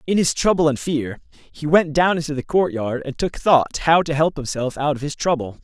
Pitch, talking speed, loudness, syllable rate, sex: 150 Hz, 235 wpm, -20 LUFS, 5.1 syllables/s, male